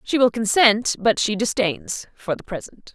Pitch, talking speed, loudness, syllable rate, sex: 215 Hz, 165 wpm, -20 LUFS, 4.4 syllables/s, female